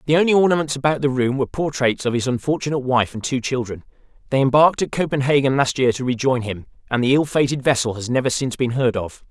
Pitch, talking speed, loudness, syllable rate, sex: 135 Hz, 225 wpm, -19 LUFS, 6.7 syllables/s, male